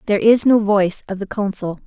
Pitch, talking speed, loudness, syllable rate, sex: 205 Hz, 225 wpm, -17 LUFS, 6.2 syllables/s, female